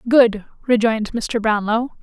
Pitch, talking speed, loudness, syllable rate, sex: 225 Hz, 120 wpm, -18 LUFS, 4.4 syllables/s, female